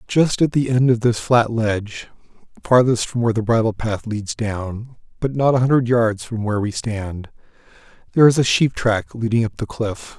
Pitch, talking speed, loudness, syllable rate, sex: 115 Hz, 200 wpm, -19 LUFS, 5.0 syllables/s, male